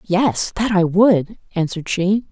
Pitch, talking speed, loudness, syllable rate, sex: 190 Hz, 155 wpm, -18 LUFS, 4.1 syllables/s, female